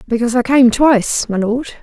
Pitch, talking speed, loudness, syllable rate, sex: 240 Hz, 195 wpm, -14 LUFS, 5.7 syllables/s, female